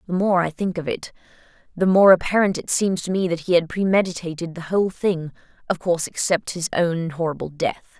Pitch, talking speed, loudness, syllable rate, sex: 175 Hz, 195 wpm, -21 LUFS, 5.6 syllables/s, female